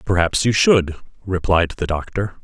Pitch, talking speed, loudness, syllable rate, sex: 95 Hz, 150 wpm, -18 LUFS, 4.6 syllables/s, male